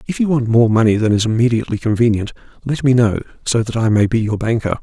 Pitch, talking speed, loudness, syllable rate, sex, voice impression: 115 Hz, 235 wpm, -16 LUFS, 6.5 syllables/s, male, very masculine, old, very thick, slightly tensed, powerful, slightly dark, soft, muffled, fluent, raspy, cool, intellectual, slightly refreshing, sincere, slightly calm, mature, friendly, slightly reassuring, unique, slightly elegant, wild, slightly sweet, slightly lively, slightly kind, slightly intense, modest